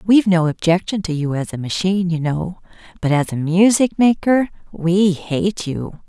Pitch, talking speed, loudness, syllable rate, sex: 180 Hz, 180 wpm, -18 LUFS, 4.7 syllables/s, female